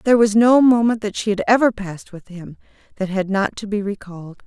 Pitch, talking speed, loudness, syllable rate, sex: 205 Hz, 230 wpm, -17 LUFS, 5.9 syllables/s, female